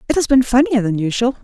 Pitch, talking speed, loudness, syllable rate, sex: 245 Hz, 250 wpm, -15 LUFS, 6.6 syllables/s, female